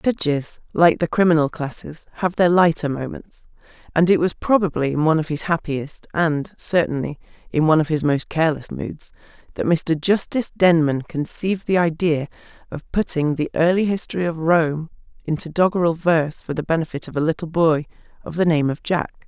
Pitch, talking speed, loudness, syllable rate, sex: 160 Hz, 175 wpm, -20 LUFS, 5.4 syllables/s, female